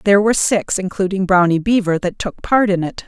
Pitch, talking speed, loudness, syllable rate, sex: 195 Hz, 215 wpm, -16 LUFS, 5.8 syllables/s, female